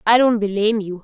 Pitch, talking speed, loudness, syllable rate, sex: 215 Hz, 230 wpm, -17 LUFS, 5.5 syllables/s, female